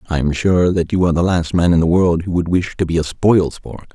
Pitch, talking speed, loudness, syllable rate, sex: 85 Hz, 305 wpm, -16 LUFS, 5.7 syllables/s, male